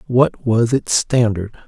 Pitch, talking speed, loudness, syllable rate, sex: 115 Hz, 145 wpm, -17 LUFS, 3.5 syllables/s, male